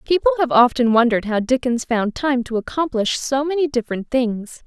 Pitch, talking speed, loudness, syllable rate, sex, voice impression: 245 Hz, 180 wpm, -19 LUFS, 5.4 syllables/s, female, very feminine, young, very thin, tensed, slightly powerful, very bright, hard, very clear, very fluent, very cute, slightly cool, intellectual, very refreshing, sincere, slightly calm, very friendly, very reassuring, unique, elegant, very sweet, very lively, slightly intense, slightly sharp, light